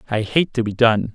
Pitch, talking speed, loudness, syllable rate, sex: 115 Hz, 260 wpm, -18 LUFS, 5.4 syllables/s, male